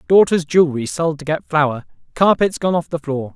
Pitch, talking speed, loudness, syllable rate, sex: 160 Hz, 195 wpm, -17 LUFS, 5.2 syllables/s, male